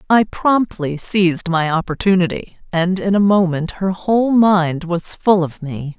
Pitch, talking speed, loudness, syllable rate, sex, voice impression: 185 Hz, 160 wpm, -17 LUFS, 4.3 syllables/s, female, very feminine, slightly adult-like, thin, tensed, powerful, slightly dark, slightly hard, clear, fluent, cool, intellectual, refreshing, slightly sincere, calm, slightly friendly, reassuring, unique, elegant, slightly wild, sweet, lively, slightly strict, slightly sharp, slightly light